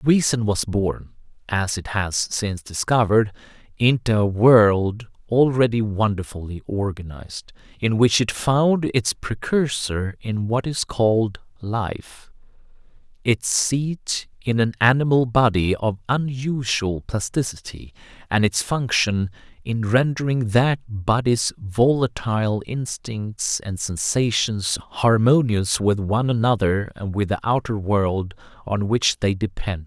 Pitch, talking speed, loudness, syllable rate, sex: 110 Hz, 115 wpm, -21 LUFS, 3.9 syllables/s, male